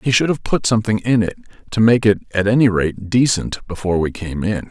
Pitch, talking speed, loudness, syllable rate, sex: 105 Hz, 230 wpm, -17 LUFS, 6.1 syllables/s, male